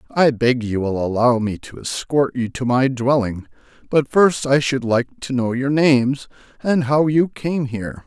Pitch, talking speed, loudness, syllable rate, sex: 130 Hz, 195 wpm, -19 LUFS, 4.4 syllables/s, male